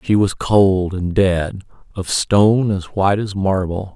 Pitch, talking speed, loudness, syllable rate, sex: 95 Hz, 150 wpm, -17 LUFS, 4.0 syllables/s, male